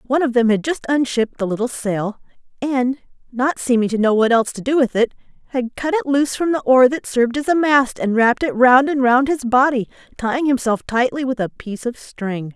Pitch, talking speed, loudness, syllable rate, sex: 250 Hz, 220 wpm, -18 LUFS, 5.7 syllables/s, female